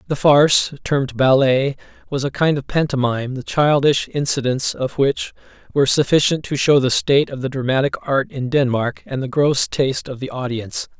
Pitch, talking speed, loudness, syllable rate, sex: 135 Hz, 180 wpm, -18 LUFS, 5.3 syllables/s, male